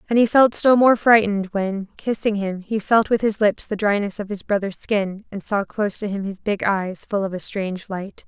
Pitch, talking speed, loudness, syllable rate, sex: 205 Hz, 240 wpm, -20 LUFS, 5.1 syllables/s, female